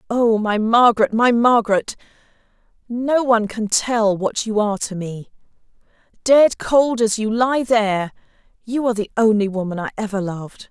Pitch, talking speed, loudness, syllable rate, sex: 220 Hz, 145 wpm, -18 LUFS, 5.0 syllables/s, female